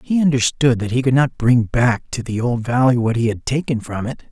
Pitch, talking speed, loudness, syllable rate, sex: 125 Hz, 250 wpm, -18 LUFS, 5.4 syllables/s, male